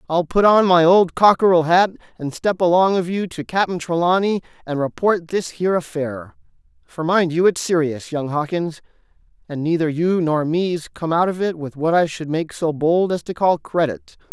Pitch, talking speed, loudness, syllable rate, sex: 170 Hz, 195 wpm, -19 LUFS, 4.9 syllables/s, male